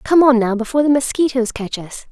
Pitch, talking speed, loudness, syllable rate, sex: 250 Hz, 225 wpm, -16 LUFS, 6.0 syllables/s, female